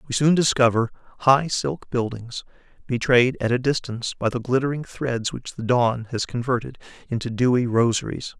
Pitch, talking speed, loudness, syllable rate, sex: 125 Hz, 155 wpm, -22 LUFS, 5.1 syllables/s, male